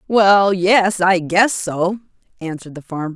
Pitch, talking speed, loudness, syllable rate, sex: 185 Hz, 150 wpm, -16 LUFS, 4.2 syllables/s, female